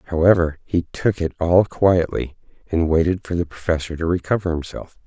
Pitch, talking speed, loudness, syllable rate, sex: 85 Hz, 165 wpm, -20 LUFS, 5.1 syllables/s, male